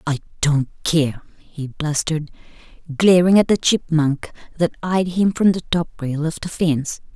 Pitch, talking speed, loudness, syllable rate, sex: 160 Hz, 160 wpm, -19 LUFS, 4.6 syllables/s, female